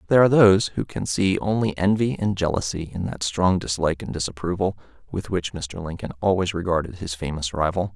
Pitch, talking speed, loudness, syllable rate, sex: 90 Hz, 190 wpm, -23 LUFS, 5.9 syllables/s, male